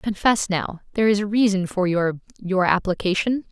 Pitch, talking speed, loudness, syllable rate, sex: 195 Hz, 155 wpm, -21 LUFS, 5.3 syllables/s, female